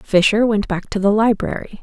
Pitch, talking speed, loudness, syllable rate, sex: 210 Hz, 200 wpm, -17 LUFS, 5.1 syllables/s, female